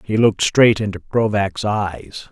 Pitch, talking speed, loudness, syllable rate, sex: 105 Hz, 155 wpm, -17 LUFS, 4.2 syllables/s, male